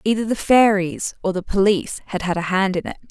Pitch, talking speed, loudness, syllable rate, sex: 200 Hz, 230 wpm, -19 LUFS, 5.9 syllables/s, female